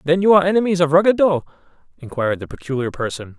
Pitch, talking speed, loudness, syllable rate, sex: 160 Hz, 175 wpm, -18 LUFS, 7.3 syllables/s, male